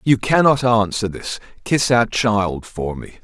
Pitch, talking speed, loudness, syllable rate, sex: 110 Hz, 165 wpm, -18 LUFS, 3.9 syllables/s, male